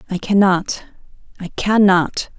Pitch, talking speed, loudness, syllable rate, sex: 190 Hz, 100 wpm, -16 LUFS, 3.8 syllables/s, female